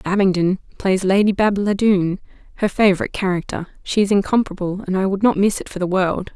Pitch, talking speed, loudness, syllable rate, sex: 195 Hz, 180 wpm, -19 LUFS, 6.0 syllables/s, female